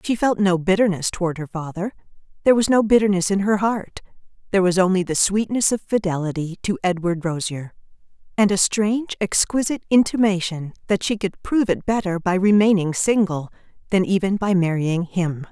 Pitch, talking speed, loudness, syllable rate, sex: 190 Hz, 165 wpm, -20 LUFS, 5.5 syllables/s, female